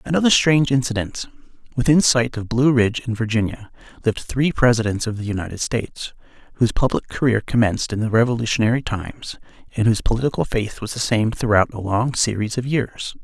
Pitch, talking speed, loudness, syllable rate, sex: 115 Hz, 170 wpm, -20 LUFS, 6.1 syllables/s, male